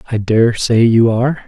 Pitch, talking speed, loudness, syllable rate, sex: 115 Hz, 205 wpm, -13 LUFS, 4.8 syllables/s, male